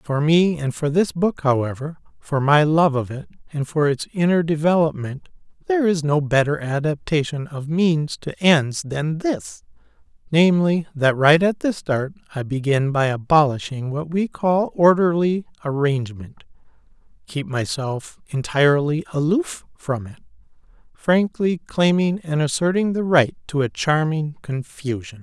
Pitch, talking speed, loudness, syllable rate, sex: 155 Hz, 140 wpm, -20 LUFS, 4.4 syllables/s, male